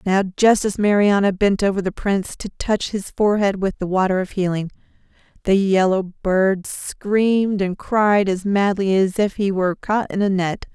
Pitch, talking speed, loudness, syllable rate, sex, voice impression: 195 Hz, 185 wpm, -19 LUFS, 4.6 syllables/s, female, feminine, very adult-like, slightly soft, calm, slightly reassuring, elegant